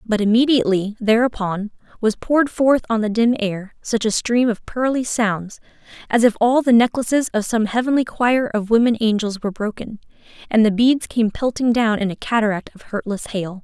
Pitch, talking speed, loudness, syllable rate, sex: 225 Hz, 185 wpm, -19 LUFS, 5.2 syllables/s, female